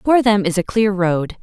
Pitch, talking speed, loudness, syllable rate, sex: 200 Hz, 255 wpm, -17 LUFS, 5.8 syllables/s, female